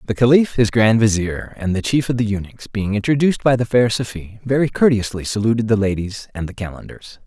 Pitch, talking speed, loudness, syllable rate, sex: 110 Hz, 205 wpm, -18 LUFS, 5.8 syllables/s, male